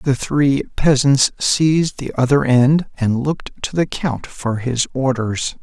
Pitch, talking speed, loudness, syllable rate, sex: 135 Hz, 160 wpm, -17 LUFS, 3.9 syllables/s, male